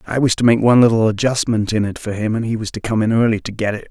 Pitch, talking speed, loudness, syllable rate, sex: 110 Hz, 325 wpm, -17 LUFS, 6.9 syllables/s, male